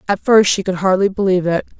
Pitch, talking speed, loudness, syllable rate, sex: 190 Hz, 235 wpm, -15 LUFS, 6.6 syllables/s, female